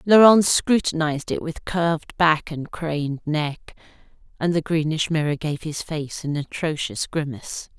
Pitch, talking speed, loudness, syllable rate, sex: 160 Hz, 145 wpm, -22 LUFS, 4.5 syllables/s, female